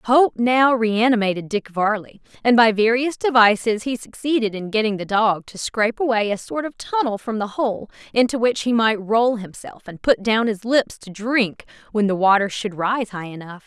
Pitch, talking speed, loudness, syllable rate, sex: 220 Hz, 200 wpm, -20 LUFS, 4.8 syllables/s, female